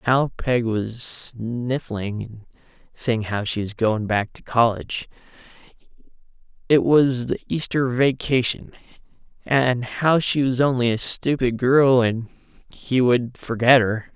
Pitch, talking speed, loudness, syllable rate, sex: 120 Hz, 125 wpm, -21 LUFS, 4.0 syllables/s, male